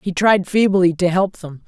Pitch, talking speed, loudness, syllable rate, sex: 185 Hz, 215 wpm, -16 LUFS, 4.5 syllables/s, female